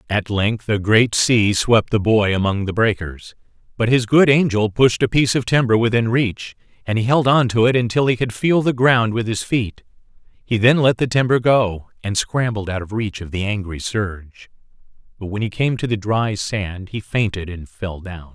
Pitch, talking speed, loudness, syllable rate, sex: 110 Hz, 215 wpm, -18 LUFS, 4.8 syllables/s, male